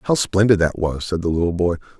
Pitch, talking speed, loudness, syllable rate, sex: 90 Hz, 240 wpm, -19 LUFS, 5.8 syllables/s, male